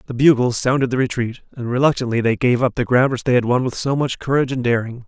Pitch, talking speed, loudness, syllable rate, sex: 125 Hz, 260 wpm, -18 LUFS, 6.5 syllables/s, male